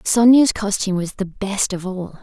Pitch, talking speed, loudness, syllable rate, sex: 200 Hz, 190 wpm, -18 LUFS, 4.7 syllables/s, female